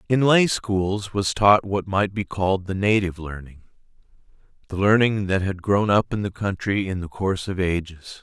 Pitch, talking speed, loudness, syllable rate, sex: 95 Hz, 180 wpm, -22 LUFS, 4.9 syllables/s, male